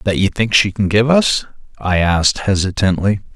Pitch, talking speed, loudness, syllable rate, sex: 100 Hz, 180 wpm, -15 LUFS, 5.0 syllables/s, male